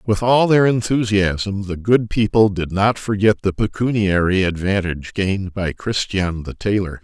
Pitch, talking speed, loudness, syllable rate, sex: 100 Hz, 155 wpm, -18 LUFS, 4.5 syllables/s, male